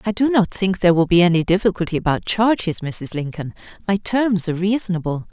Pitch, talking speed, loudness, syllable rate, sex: 185 Hz, 190 wpm, -19 LUFS, 6.0 syllables/s, female